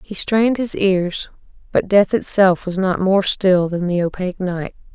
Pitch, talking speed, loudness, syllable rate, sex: 190 Hz, 180 wpm, -18 LUFS, 4.5 syllables/s, female